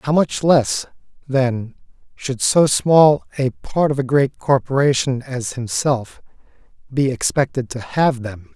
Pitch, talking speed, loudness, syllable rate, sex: 135 Hz, 140 wpm, -18 LUFS, 3.7 syllables/s, male